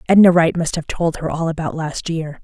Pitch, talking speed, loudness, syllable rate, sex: 165 Hz, 245 wpm, -18 LUFS, 5.3 syllables/s, female